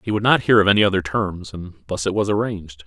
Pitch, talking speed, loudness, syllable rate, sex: 95 Hz, 270 wpm, -19 LUFS, 6.5 syllables/s, male